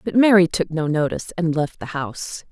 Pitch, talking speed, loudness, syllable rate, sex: 170 Hz, 215 wpm, -20 LUFS, 5.5 syllables/s, female